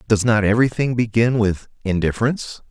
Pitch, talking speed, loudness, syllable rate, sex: 115 Hz, 135 wpm, -19 LUFS, 6.0 syllables/s, male